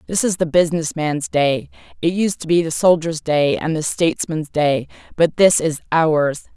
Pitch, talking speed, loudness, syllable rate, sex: 160 Hz, 190 wpm, -18 LUFS, 4.7 syllables/s, female